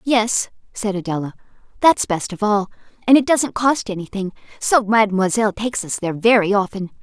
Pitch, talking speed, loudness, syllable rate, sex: 210 Hz, 160 wpm, -18 LUFS, 5.6 syllables/s, female